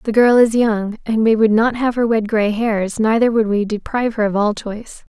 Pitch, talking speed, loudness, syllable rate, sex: 220 Hz, 245 wpm, -16 LUFS, 5.1 syllables/s, female